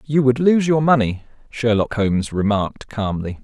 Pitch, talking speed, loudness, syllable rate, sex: 120 Hz, 155 wpm, -19 LUFS, 4.9 syllables/s, male